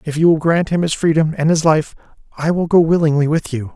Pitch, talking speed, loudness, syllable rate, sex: 160 Hz, 255 wpm, -16 LUFS, 5.8 syllables/s, male